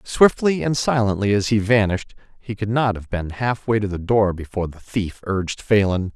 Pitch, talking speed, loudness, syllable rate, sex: 105 Hz, 205 wpm, -20 LUFS, 5.2 syllables/s, male